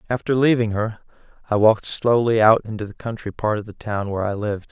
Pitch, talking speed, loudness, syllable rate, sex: 110 Hz, 215 wpm, -20 LUFS, 6.2 syllables/s, male